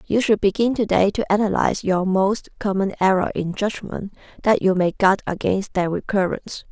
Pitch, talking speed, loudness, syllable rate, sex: 195 Hz, 170 wpm, -20 LUFS, 5.1 syllables/s, female